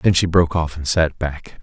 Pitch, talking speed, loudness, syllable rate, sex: 80 Hz, 260 wpm, -19 LUFS, 5.0 syllables/s, male